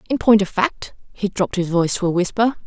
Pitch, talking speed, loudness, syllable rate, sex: 200 Hz, 250 wpm, -19 LUFS, 6.2 syllables/s, female